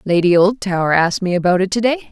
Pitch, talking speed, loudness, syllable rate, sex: 190 Hz, 225 wpm, -15 LUFS, 6.5 syllables/s, female